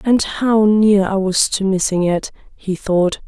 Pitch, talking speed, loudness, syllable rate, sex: 200 Hz, 185 wpm, -16 LUFS, 3.8 syllables/s, female